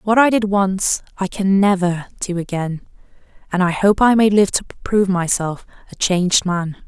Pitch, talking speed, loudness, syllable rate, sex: 190 Hz, 185 wpm, -17 LUFS, 4.7 syllables/s, female